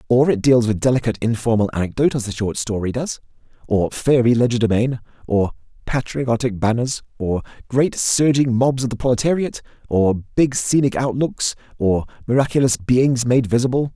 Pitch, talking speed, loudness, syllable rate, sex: 120 Hz, 145 wpm, -19 LUFS, 5.3 syllables/s, male